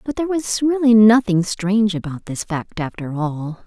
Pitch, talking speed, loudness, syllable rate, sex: 205 Hz, 180 wpm, -18 LUFS, 4.9 syllables/s, female